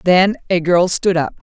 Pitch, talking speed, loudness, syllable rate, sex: 180 Hz, 195 wpm, -16 LUFS, 4.3 syllables/s, female